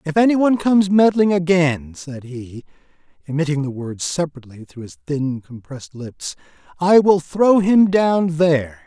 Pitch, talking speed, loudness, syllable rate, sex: 160 Hz, 150 wpm, -17 LUFS, 4.8 syllables/s, male